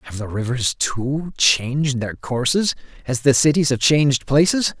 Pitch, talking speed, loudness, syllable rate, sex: 135 Hz, 165 wpm, -19 LUFS, 4.4 syllables/s, male